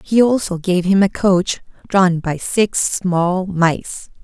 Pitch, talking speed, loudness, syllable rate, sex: 185 Hz, 155 wpm, -17 LUFS, 3.2 syllables/s, female